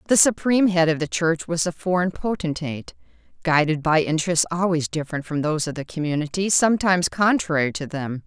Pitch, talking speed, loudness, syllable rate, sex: 165 Hz, 175 wpm, -21 LUFS, 6.0 syllables/s, female